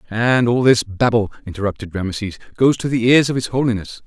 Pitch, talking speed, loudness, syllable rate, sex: 115 Hz, 190 wpm, -18 LUFS, 5.9 syllables/s, male